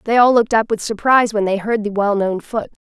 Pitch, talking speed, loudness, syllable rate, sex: 215 Hz, 245 wpm, -17 LUFS, 6.3 syllables/s, female